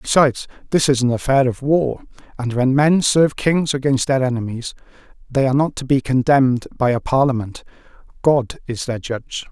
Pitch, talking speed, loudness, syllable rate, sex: 130 Hz, 170 wpm, -18 LUFS, 5.4 syllables/s, male